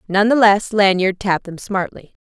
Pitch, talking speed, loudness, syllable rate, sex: 200 Hz, 190 wpm, -16 LUFS, 5.0 syllables/s, female